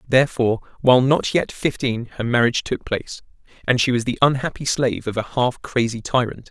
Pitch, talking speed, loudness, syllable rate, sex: 125 Hz, 185 wpm, -20 LUFS, 5.8 syllables/s, male